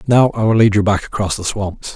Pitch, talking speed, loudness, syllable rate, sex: 105 Hz, 275 wpm, -16 LUFS, 5.6 syllables/s, male